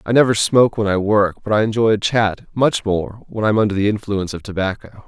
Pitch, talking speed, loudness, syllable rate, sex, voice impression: 105 Hz, 250 wpm, -18 LUFS, 6.0 syllables/s, male, very masculine, very adult-like, thick, tensed, powerful, slightly bright, soft, fluent, cool, very intellectual, refreshing, sincere, very calm, very mature, very friendly, very reassuring, unique, elegant, very wild, very sweet, lively, very kind, slightly modest